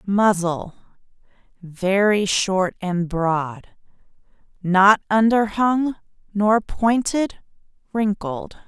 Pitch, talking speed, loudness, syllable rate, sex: 200 Hz, 60 wpm, -20 LUFS, 2.8 syllables/s, female